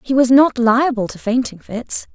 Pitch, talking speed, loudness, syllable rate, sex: 245 Hz, 195 wpm, -16 LUFS, 4.5 syllables/s, female